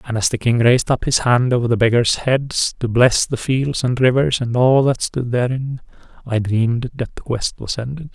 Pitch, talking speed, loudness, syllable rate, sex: 125 Hz, 220 wpm, -18 LUFS, 4.9 syllables/s, male